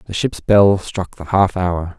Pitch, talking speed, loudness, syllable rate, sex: 95 Hz, 210 wpm, -17 LUFS, 3.8 syllables/s, male